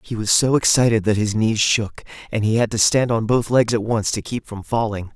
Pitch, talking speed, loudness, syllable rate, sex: 110 Hz, 255 wpm, -19 LUFS, 5.2 syllables/s, male